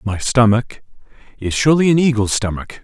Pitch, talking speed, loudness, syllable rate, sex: 120 Hz, 125 wpm, -16 LUFS, 5.6 syllables/s, male